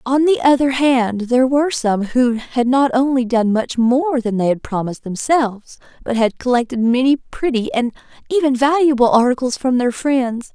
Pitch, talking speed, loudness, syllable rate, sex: 255 Hz, 175 wpm, -16 LUFS, 5.0 syllables/s, female